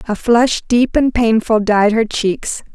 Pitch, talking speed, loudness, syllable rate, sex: 225 Hz, 175 wpm, -15 LUFS, 3.6 syllables/s, female